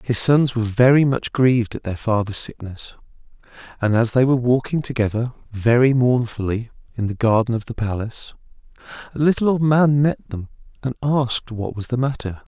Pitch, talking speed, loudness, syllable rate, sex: 120 Hz, 170 wpm, -19 LUFS, 5.4 syllables/s, male